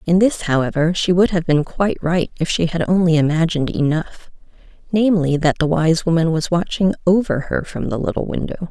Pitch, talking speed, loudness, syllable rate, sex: 170 Hz, 185 wpm, -18 LUFS, 5.5 syllables/s, female